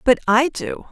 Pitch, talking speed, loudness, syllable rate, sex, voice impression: 235 Hz, 195 wpm, -18 LUFS, 4.8 syllables/s, female, feminine, adult-like, slightly clear, slightly intellectual, slightly calm